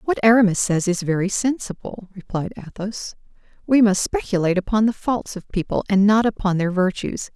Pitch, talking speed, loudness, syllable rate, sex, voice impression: 200 Hz, 170 wpm, -20 LUFS, 5.4 syllables/s, female, very feminine, adult-like, slightly middle-aged, thin, slightly tensed, slightly weak, bright, slightly hard, clear, cool, very intellectual, refreshing, very sincere, very calm, very friendly, very reassuring, unique, very elegant, slightly wild, very sweet, slightly lively, very kind, modest, light